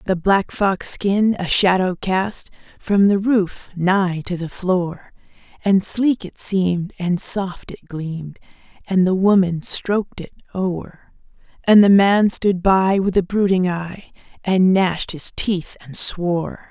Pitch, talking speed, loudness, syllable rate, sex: 185 Hz, 155 wpm, -18 LUFS, 3.7 syllables/s, female